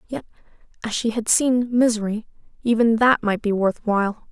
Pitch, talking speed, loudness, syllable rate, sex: 225 Hz, 165 wpm, -20 LUFS, 5.0 syllables/s, female